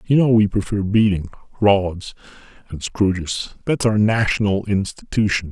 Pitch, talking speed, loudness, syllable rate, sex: 100 Hz, 110 wpm, -19 LUFS, 4.6 syllables/s, male